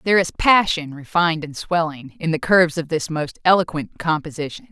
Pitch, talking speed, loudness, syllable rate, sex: 165 Hz, 180 wpm, -20 LUFS, 5.6 syllables/s, female